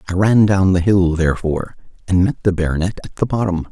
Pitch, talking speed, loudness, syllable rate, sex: 90 Hz, 210 wpm, -17 LUFS, 6.1 syllables/s, male